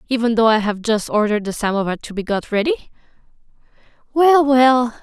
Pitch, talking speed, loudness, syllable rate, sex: 230 Hz, 165 wpm, -17 LUFS, 5.6 syllables/s, female